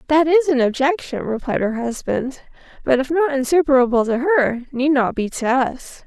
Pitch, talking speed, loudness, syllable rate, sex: 270 Hz, 180 wpm, -18 LUFS, 5.0 syllables/s, female